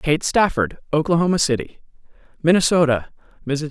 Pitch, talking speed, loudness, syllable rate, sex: 160 Hz, 95 wpm, -19 LUFS, 5.5 syllables/s, female